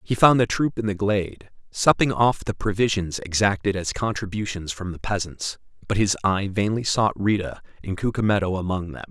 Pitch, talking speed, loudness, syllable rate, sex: 100 Hz, 180 wpm, -23 LUFS, 5.3 syllables/s, male